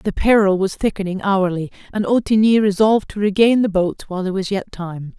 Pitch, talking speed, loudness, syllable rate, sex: 195 Hz, 195 wpm, -18 LUFS, 5.7 syllables/s, female